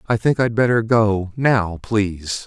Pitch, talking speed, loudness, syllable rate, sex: 110 Hz, 170 wpm, -19 LUFS, 4.0 syllables/s, male